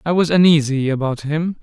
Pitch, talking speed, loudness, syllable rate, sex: 150 Hz, 185 wpm, -16 LUFS, 5.3 syllables/s, male